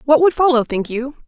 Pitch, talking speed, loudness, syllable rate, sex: 270 Hz, 235 wpm, -16 LUFS, 5.7 syllables/s, female